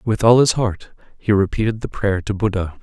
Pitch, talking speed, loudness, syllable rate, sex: 105 Hz, 210 wpm, -18 LUFS, 5.3 syllables/s, male